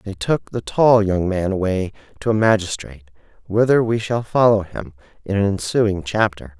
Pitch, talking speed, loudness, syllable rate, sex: 100 Hz, 175 wpm, -19 LUFS, 4.9 syllables/s, male